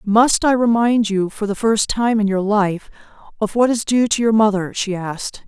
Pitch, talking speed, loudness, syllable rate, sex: 215 Hz, 220 wpm, -17 LUFS, 4.8 syllables/s, female